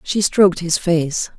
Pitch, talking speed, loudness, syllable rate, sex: 175 Hz, 175 wpm, -17 LUFS, 4.0 syllables/s, female